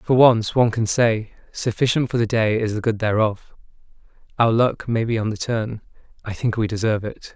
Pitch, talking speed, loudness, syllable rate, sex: 115 Hz, 195 wpm, -20 LUFS, 5.3 syllables/s, male